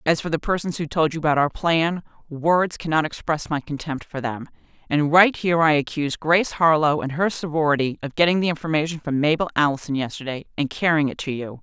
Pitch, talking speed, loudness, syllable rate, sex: 155 Hz, 205 wpm, -21 LUFS, 6.0 syllables/s, female